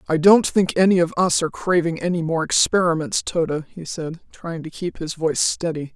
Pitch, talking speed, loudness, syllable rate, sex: 170 Hz, 200 wpm, -20 LUFS, 5.2 syllables/s, female